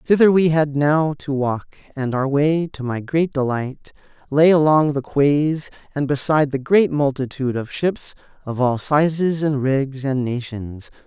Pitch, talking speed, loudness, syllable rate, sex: 145 Hz, 170 wpm, -19 LUFS, 4.3 syllables/s, male